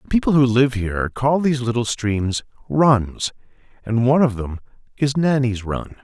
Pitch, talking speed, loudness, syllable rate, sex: 125 Hz, 170 wpm, -19 LUFS, 4.8 syllables/s, male